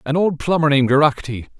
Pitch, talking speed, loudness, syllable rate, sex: 145 Hz, 190 wpm, -16 LUFS, 6.4 syllables/s, male